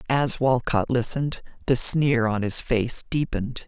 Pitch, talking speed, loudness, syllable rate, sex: 125 Hz, 145 wpm, -23 LUFS, 4.4 syllables/s, female